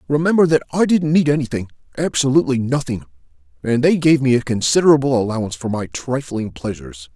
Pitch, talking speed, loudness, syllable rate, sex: 130 Hz, 160 wpm, -18 LUFS, 6.3 syllables/s, male